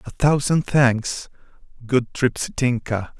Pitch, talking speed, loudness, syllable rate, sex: 125 Hz, 95 wpm, -21 LUFS, 3.8 syllables/s, male